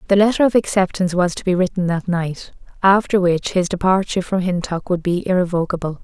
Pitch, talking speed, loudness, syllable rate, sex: 185 Hz, 190 wpm, -18 LUFS, 6.0 syllables/s, female